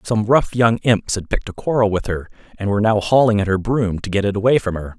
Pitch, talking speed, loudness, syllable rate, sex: 105 Hz, 275 wpm, -18 LUFS, 6.1 syllables/s, male